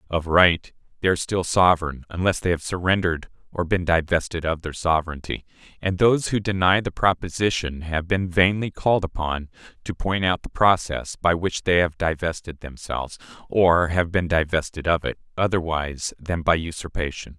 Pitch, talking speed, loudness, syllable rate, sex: 85 Hz, 165 wpm, -22 LUFS, 5.3 syllables/s, male